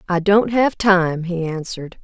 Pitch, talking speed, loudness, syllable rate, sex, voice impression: 185 Hz, 175 wpm, -18 LUFS, 4.3 syllables/s, female, feminine, slightly gender-neutral, slightly young, adult-like, slightly thick, tensed, slightly powerful, very bright, slightly hard, clear, fluent, slightly raspy, slightly cool, intellectual, slightly refreshing, sincere, calm, slightly friendly, slightly elegant, very lively, slightly strict, slightly sharp